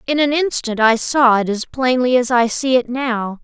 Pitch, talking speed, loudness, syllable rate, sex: 245 Hz, 225 wpm, -16 LUFS, 4.6 syllables/s, female